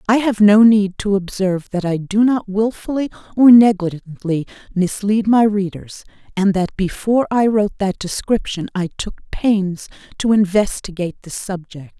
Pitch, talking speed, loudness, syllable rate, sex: 200 Hz, 150 wpm, -17 LUFS, 4.7 syllables/s, female